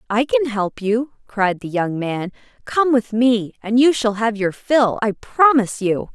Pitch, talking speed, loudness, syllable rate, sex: 225 Hz, 195 wpm, -18 LUFS, 4.3 syllables/s, female